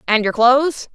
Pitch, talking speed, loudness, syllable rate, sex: 250 Hz, 190 wpm, -15 LUFS, 5.2 syllables/s, female